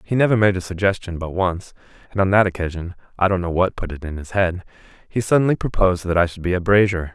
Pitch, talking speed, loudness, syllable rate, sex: 95 Hz, 245 wpm, -20 LUFS, 5.5 syllables/s, male